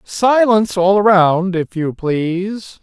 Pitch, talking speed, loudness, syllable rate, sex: 190 Hz, 125 wpm, -15 LUFS, 3.3 syllables/s, male